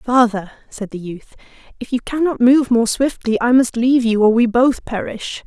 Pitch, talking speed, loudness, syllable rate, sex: 235 Hz, 200 wpm, -16 LUFS, 4.9 syllables/s, female